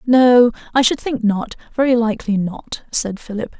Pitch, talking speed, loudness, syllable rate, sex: 235 Hz, 165 wpm, -17 LUFS, 4.7 syllables/s, female